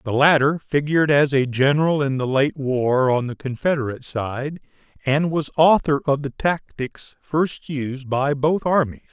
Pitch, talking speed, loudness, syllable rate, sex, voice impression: 140 Hz, 165 wpm, -20 LUFS, 4.5 syllables/s, male, masculine, middle-aged, thick, tensed, clear, fluent, calm, mature, friendly, reassuring, wild, slightly strict